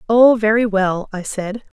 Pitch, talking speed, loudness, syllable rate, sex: 210 Hz, 170 wpm, -16 LUFS, 4.2 syllables/s, female